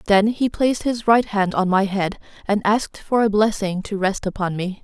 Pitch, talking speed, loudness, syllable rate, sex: 205 Hz, 225 wpm, -20 LUFS, 5.1 syllables/s, female